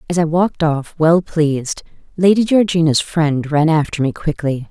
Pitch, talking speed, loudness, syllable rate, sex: 160 Hz, 165 wpm, -16 LUFS, 4.8 syllables/s, female